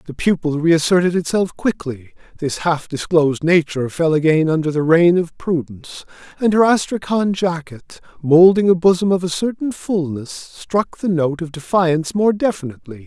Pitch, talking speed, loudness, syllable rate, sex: 170 Hz, 155 wpm, -17 LUFS, 5.0 syllables/s, male